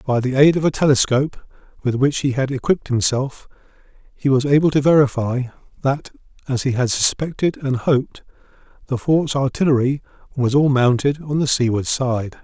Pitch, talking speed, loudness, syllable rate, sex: 135 Hz, 165 wpm, -18 LUFS, 5.3 syllables/s, male